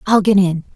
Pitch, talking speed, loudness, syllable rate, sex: 195 Hz, 240 wpm, -15 LUFS, 5.5 syllables/s, female